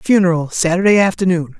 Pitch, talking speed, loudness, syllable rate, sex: 180 Hz, 115 wpm, -14 LUFS, 5.8 syllables/s, male